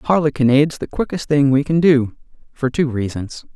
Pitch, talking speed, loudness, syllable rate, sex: 140 Hz, 185 wpm, -17 LUFS, 5.6 syllables/s, male